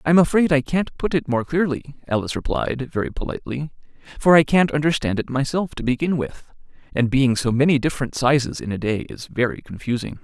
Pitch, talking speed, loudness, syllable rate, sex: 140 Hz, 195 wpm, -21 LUFS, 5.9 syllables/s, male